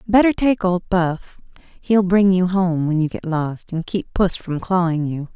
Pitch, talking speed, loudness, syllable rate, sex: 180 Hz, 200 wpm, -19 LUFS, 4.1 syllables/s, female